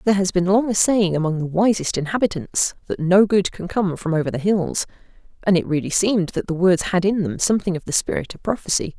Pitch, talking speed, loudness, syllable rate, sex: 185 Hz, 235 wpm, -20 LUFS, 6.0 syllables/s, female